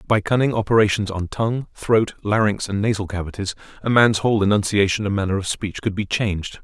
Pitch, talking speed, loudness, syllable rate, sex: 105 Hz, 190 wpm, -20 LUFS, 5.9 syllables/s, male